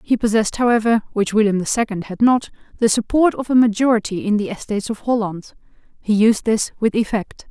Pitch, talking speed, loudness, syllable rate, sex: 220 Hz, 190 wpm, -18 LUFS, 5.9 syllables/s, female